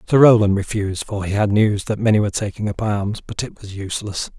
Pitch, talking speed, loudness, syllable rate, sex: 105 Hz, 235 wpm, -19 LUFS, 6.1 syllables/s, male